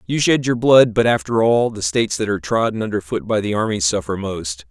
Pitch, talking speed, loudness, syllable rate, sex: 105 Hz, 240 wpm, -18 LUFS, 5.7 syllables/s, male